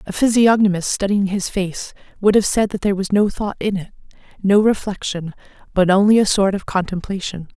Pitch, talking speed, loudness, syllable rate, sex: 195 Hz, 180 wpm, -18 LUFS, 5.5 syllables/s, female